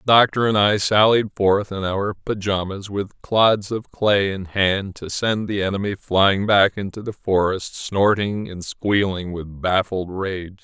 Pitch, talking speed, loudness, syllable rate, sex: 100 Hz, 170 wpm, -20 LUFS, 4.0 syllables/s, male